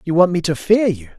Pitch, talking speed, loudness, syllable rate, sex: 170 Hz, 305 wpm, -17 LUFS, 5.9 syllables/s, male